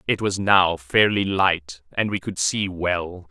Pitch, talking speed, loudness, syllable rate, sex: 90 Hz, 180 wpm, -21 LUFS, 3.6 syllables/s, male